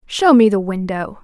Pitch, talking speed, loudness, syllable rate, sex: 220 Hz, 195 wpm, -15 LUFS, 4.6 syllables/s, female